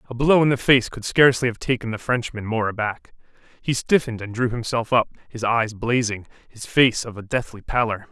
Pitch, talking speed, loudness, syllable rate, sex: 115 Hz, 205 wpm, -21 LUFS, 5.6 syllables/s, male